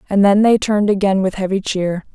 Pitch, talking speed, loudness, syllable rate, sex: 195 Hz, 225 wpm, -16 LUFS, 5.8 syllables/s, female